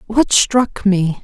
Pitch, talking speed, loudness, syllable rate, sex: 210 Hz, 145 wpm, -14 LUFS, 2.8 syllables/s, female